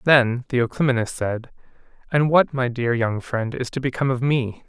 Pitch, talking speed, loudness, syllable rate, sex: 125 Hz, 180 wpm, -22 LUFS, 4.8 syllables/s, male